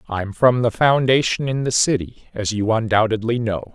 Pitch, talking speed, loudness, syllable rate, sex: 115 Hz, 175 wpm, -19 LUFS, 4.9 syllables/s, male